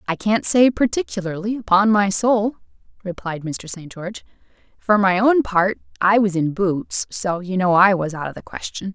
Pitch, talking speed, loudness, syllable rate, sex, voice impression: 195 Hz, 190 wpm, -19 LUFS, 4.8 syllables/s, female, feminine, adult-like, slightly clear, intellectual, slightly sharp